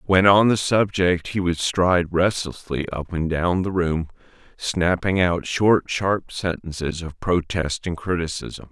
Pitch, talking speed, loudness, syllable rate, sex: 90 Hz, 150 wpm, -21 LUFS, 4.0 syllables/s, male